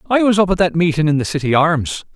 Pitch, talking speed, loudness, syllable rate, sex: 165 Hz, 280 wpm, -16 LUFS, 6.1 syllables/s, male